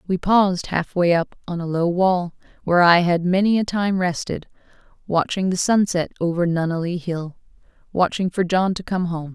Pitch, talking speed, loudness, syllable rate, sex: 180 Hz, 165 wpm, -20 LUFS, 5.0 syllables/s, female